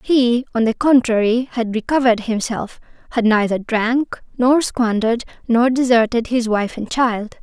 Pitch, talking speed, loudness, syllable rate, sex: 235 Hz, 145 wpm, -17 LUFS, 4.6 syllables/s, female